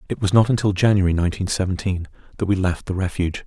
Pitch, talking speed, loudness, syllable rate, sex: 95 Hz, 210 wpm, -21 LUFS, 7.1 syllables/s, male